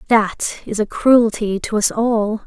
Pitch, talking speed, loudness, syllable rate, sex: 220 Hz, 170 wpm, -17 LUFS, 3.6 syllables/s, female